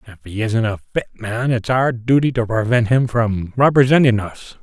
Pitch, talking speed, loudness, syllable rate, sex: 115 Hz, 195 wpm, -17 LUFS, 5.0 syllables/s, male